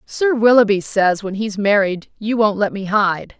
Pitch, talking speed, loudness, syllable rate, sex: 210 Hz, 195 wpm, -17 LUFS, 4.4 syllables/s, female